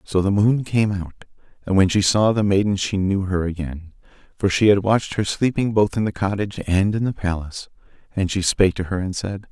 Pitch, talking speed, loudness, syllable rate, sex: 100 Hz, 225 wpm, -20 LUFS, 5.5 syllables/s, male